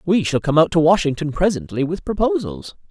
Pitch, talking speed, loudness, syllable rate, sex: 155 Hz, 185 wpm, -18 LUFS, 5.6 syllables/s, male